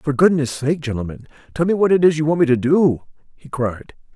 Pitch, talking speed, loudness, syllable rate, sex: 145 Hz, 230 wpm, -18 LUFS, 5.7 syllables/s, male